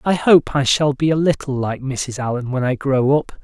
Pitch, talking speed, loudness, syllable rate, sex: 140 Hz, 245 wpm, -18 LUFS, 4.8 syllables/s, male